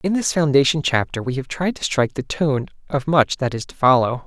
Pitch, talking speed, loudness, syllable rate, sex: 140 Hz, 240 wpm, -20 LUFS, 5.5 syllables/s, male